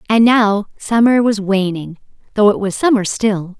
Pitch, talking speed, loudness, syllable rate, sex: 210 Hz, 165 wpm, -14 LUFS, 4.4 syllables/s, female